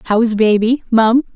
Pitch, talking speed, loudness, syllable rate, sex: 230 Hz, 135 wpm, -13 LUFS, 4.0 syllables/s, female